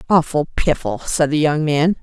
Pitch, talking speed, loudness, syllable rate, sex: 155 Hz, 180 wpm, -18 LUFS, 4.7 syllables/s, female